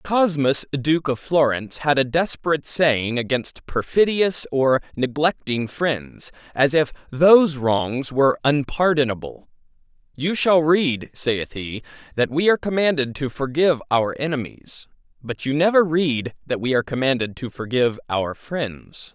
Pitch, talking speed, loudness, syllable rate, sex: 140 Hz, 140 wpm, -21 LUFS, 4.5 syllables/s, male